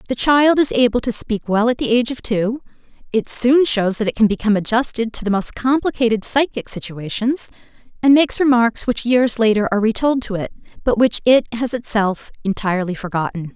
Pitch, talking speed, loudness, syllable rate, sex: 230 Hz, 190 wpm, -17 LUFS, 5.6 syllables/s, female